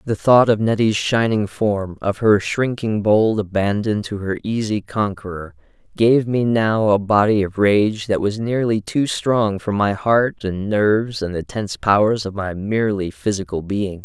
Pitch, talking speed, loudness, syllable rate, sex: 105 Hz, 175 wpm, -19 LUFS, 4.3 syllables/s, male